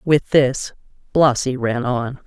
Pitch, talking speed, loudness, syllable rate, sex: 130 Hz, 130 wpm, -18 LUFS, 3.4 syllables/s, female